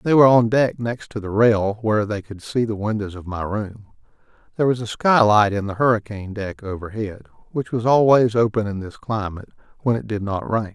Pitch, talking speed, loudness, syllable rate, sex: 110 Hz, 210 wpm, -20 LUFS, 5.7 syllables/s, male